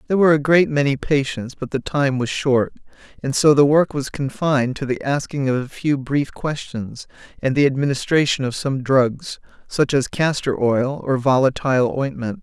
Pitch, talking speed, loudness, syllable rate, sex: 135 Hz, 185 wpm, -19 LUFS, 4.9 syllables/s, male